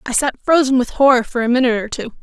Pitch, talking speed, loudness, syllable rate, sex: 250 Hz, 270 wpm, -16 LUFS, 7.1 syllables/s, female